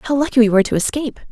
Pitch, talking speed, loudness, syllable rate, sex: 250 Hz, 275 wpm, -16 LUFS, 8.4 syllables/s, female